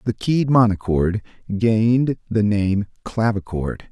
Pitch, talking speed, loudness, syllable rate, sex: 105 Hz, 105 wpm, -20 LUFS, 3.8 syllables/s, male